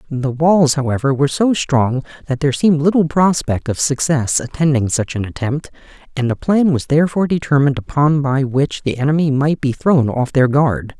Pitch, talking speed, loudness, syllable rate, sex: 140 Hz, 185 wpm, -16 LUFS, 5.3 syllables/s, male